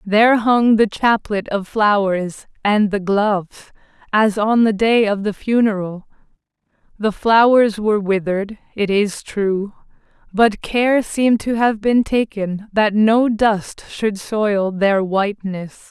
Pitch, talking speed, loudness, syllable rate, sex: 210 Hz, 140 wpm, -17 LUFS, 3.7 syllables/s, female